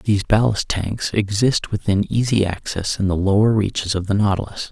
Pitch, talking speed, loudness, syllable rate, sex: 100 Hz, 180 wpm, -19 LUFS, 5.1 syllables/s, male